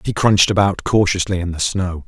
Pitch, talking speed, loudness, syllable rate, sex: 95 Hz, 205 wpm, -17 LUFS, 5.6 syllables/s, male